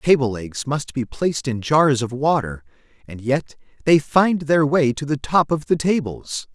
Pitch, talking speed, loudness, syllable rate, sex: 140 Hz, 195 wpm, -20 LUFS, 4.4 syllables/s, male